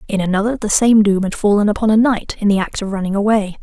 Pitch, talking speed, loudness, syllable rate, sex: 205 Hz, 265 wpm, -15 LUFS, 6.4 syllables/s, female